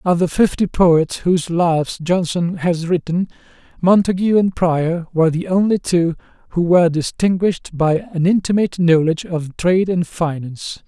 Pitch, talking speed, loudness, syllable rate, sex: 175 Hz, 150 wpm, -17 LUFS, 5.0 syllables/s, male